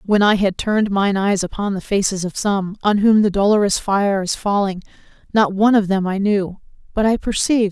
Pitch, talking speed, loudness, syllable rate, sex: 200 Hz, 210 wpm, -18 LUFS, 5.3 syllables/s, female